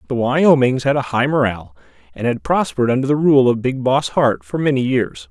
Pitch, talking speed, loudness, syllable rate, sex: 125 Hz, 215 wpm, -17 LUFS, 5.5 syllables/s, male